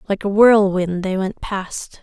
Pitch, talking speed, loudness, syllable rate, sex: 195 Hz, 180 wpm, -17 LUFS, 3.8 syllables/s, female